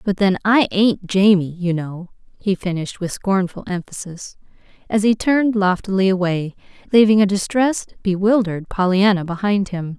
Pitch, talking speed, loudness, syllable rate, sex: 195 Hz, 145 wpm, -18 LUFS, 5.0 syllables/s, female